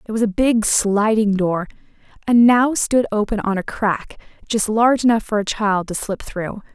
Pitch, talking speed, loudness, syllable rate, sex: 215 Hz, 195 wpm, -18 LUFS, 4.7 syllables/s, female